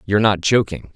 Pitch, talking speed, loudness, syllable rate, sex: 100 Hz, 190 wpm, -18 LUFS, 6.1 syllables/s, male